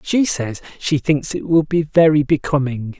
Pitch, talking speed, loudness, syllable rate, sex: 150 Hz, 180 wpm, -18 LUFS, 4.4 syllables/s, male